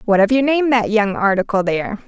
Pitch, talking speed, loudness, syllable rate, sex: 220 Hz, 230 wpm, -16 LUFS, 6.2 syllables/s, female